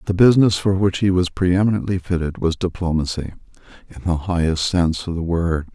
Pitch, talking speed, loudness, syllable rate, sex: 90 Hz, 175 wpm, -19 LUFS, 5.8 syllables/s, male